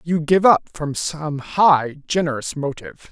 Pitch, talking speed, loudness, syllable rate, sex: 155 Hz, 155 wpm, -19 LUFS, 4.0 syllables/s, male